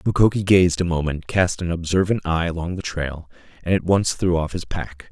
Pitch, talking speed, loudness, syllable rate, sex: 85 Hz, 210 wpm, -21 LUFS, 5.2 syllables/s, male